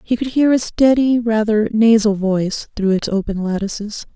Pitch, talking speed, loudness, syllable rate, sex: 220 Hz, 175 wpm, -16 LUFS, 4.9 syllables/s, female